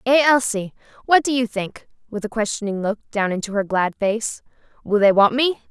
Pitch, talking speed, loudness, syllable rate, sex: 220 Hz, 190 wpm, -20 LUFS, 4.9 syllables/s, female